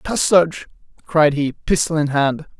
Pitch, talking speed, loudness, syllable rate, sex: 155 Hz, 140 wpm, -17 LUFS, 4.3 syllables/s, male